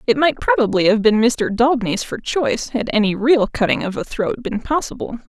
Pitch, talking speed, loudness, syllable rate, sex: 235 Hz, 200 wpm, -18 LUFS, 5.4 syllables/s, female